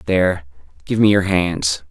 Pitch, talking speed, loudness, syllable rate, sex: 85 Hz, 155 wpm, -17 LUFS, 4.5 syllables/s, male